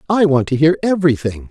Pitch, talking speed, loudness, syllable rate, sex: 150 Hz, 200 wpm, -15 LUFS, 6.5 syllables/s, male